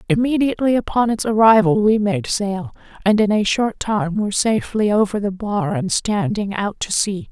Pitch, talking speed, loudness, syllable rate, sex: 205 Hz, 180 wpm, -18 LUFS, 5.0 syllables/s, female